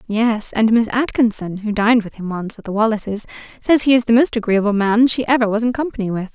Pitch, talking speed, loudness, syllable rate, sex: 225 Hz, 235 wpm, -17 LUFS, 6.0 syllables/s, female